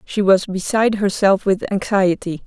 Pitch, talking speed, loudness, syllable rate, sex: 195 Hz, 145 wpm, -17 LUFS, 4.7 syllables/s, female